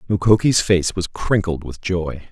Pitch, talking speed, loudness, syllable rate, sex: 95 Hz, 155 wpm, -19 LUFS, 4.4 syllables/s, male